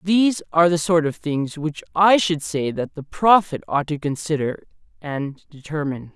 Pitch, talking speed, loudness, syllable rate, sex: 160 Hz, 175 wpm, -21 LUFS, 4.8 syllables/s, male